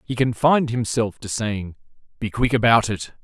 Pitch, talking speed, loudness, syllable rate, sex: 115 Hz, 165 wpm, -21 LUFS, 5.0 syllables/s, male